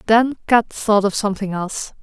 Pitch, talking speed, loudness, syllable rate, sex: 210 Hz, 180 wpm, -18 LUFS, 5.3 syllables/s, female